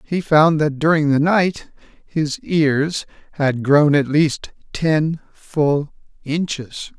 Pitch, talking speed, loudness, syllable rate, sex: 150 Hz, 130 wpm, -18 LUFS, 3.0 syllables/s, male